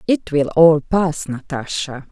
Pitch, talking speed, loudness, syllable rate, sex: 155 Hz, 140 wpm, -17 LUFS, 3.6 syllables/s, female